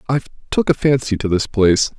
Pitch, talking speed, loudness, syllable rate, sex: 120 Hz, 210 wpm, -17 LUFS, 6.4 syllables/s, male